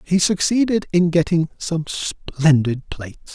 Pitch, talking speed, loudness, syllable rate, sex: 165 Hz, 125 wpm, -19 LUFS, 3.9 syllables/s, male